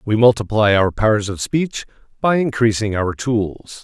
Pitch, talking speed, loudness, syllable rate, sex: 110 Hz, 155 wpm, -18 LUFS, 4.4 syllables/s, male